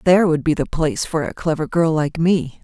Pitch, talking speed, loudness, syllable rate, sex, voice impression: 160 Hz, 250 wpm, -19 LUFS, 5.7 syllables/s, female, feminine, adult-like, tensed, powerful, slightly hard, clear, fluent, intellectual, calm, slightly friendly, reassuring, elegant, lively